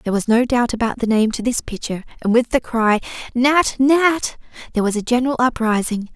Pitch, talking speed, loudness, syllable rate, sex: 235 Hz, 205 wpm, -18 LUFS, 5.8 syllables/s, female